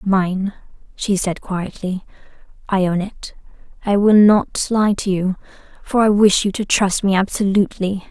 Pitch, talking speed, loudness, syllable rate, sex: 195 Hz, 150 wpm, -17 LUFS, 4.3 syllables/s, female